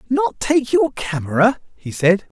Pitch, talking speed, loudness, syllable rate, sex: 190 Hz, 150 wpm, -18 LUFS, 4.0 syllables/s, male